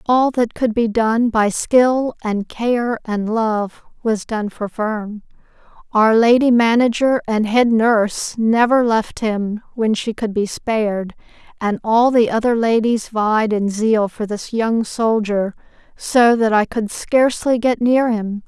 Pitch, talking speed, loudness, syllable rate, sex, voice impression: 225 Hz, 160 wpm, -17 LUFS, 3.7 syllables/s, female, feminine, adult-like, soft, slightly clear, slightly halting, calm, friendly, reassuring, slightly elegant, lively, kind, modest